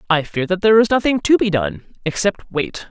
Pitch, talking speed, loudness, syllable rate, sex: 200 Hz, 225 wpm, -17 LUFS, 5.7 syllables/s, female